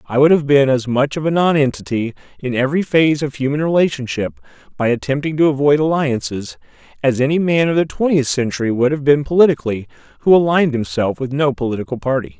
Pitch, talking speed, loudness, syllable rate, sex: 140 Hz, 185 wpm, -16 LUFS, 6.3 syllables/s, male